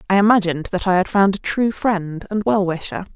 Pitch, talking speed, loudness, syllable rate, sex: 195 Hz, 230 wpm, -19 LUFS, 5.7 syllables/s, female